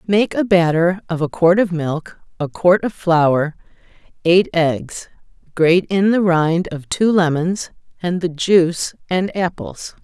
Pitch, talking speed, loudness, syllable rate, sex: 175 Hz, 150 wpm, -17 LUFS, 3.9 syllables/s, female